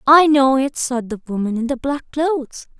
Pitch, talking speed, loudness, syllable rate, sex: 270 Hz, 215 wpm, -18 LUFS, 4.8 syllables/s, female